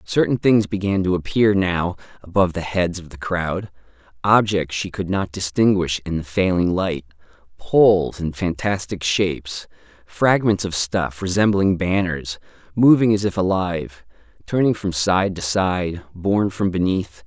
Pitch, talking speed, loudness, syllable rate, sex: 90 Hz, 140 wpm, -20 LUFS, 4.5 syllables/s, male